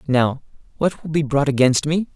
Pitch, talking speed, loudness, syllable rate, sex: 145 Hz, 195 wpm, -19 LUFS, 5.0 syllables/s, male